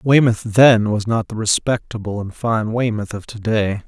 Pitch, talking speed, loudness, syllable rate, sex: 110 Hz, 185 wpm, -18 LUFS, 4.5 syllables/s, male